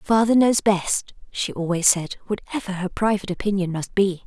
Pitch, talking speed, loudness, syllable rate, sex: 195 Hz, 170 wpm, -22 LUFS, 5.1 syllables/s, female